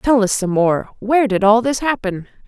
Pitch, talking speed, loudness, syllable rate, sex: 220 Hz, 220 wpm, -16 LUFS, 5.1 syllables/s, female